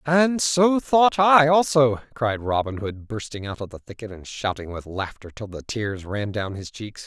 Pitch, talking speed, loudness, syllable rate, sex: 120 Hz, 205 wpm, -22 LUFS, 4.4 syllables/s, male